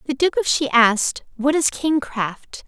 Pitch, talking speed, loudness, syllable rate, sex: 270 Hz, 180 wpm, -19 LUFS, 4.3 syllables/s, female